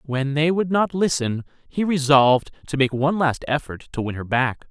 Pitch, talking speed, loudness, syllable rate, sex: 145 Hz, 205 wpm, -21 LUFS, 5.0 syllables/s, male